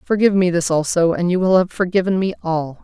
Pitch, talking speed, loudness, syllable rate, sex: 180 Hz, 230 wpm, -17 LUFS, 6.0 syllables/s, female